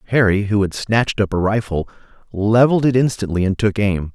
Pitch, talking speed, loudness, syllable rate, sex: 105 Hz, 190 wpm, -17 LUFS, 5.8 syllables/s, male